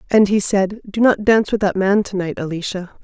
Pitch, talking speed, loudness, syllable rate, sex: 195 Hz, 215 wpm, -17 LUFS, 5.4 syllables/s, female